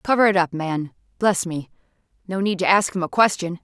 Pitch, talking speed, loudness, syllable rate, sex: 185 Hz, 180 wpm, -21 LUFS, 5.4 syllables/s, female